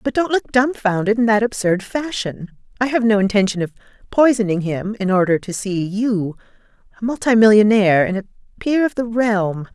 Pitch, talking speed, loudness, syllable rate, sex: 215 Hz, 170 wpm, -18 LUFS, 5.4 syllables/s, female